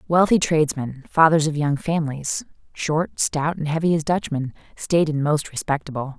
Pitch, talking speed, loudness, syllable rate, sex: 155 Hz, 155 wpm, -21 LUFS, 5.0 syllables/s, female